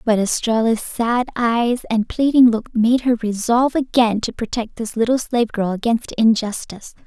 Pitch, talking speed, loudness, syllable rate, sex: 230 Hz, 160 wpm, -18 LUFS, 4.8 syllables/s, female